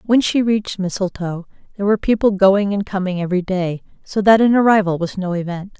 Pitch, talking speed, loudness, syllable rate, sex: 195 Hz, 195 wpm, -17 LUFS, 6.0 syllables/s, female